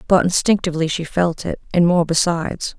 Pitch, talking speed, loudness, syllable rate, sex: 170 Hz, 175 wpm, -18 LUFS, 5.6 syllables/s, female